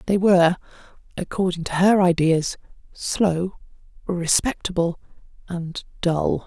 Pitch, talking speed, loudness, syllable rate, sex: 180 Hz, 95 wpm, -21 LUFS, 4.0 syllables/s, female